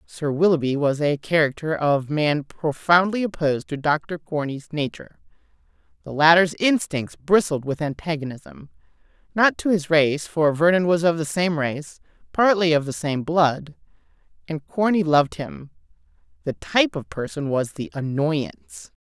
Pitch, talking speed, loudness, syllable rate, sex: 160 Hz, 140 wpm, -21 LUFS, 4.6 syllables/s, female